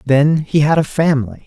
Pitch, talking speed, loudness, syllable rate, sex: 145 Hz, 205 wpm, -15 LUFS, 5.1 syllables/s, male